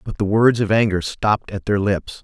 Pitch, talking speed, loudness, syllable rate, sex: 105 Hz, 240 wpm, -19 LUFS, 5.2 syllables/s, male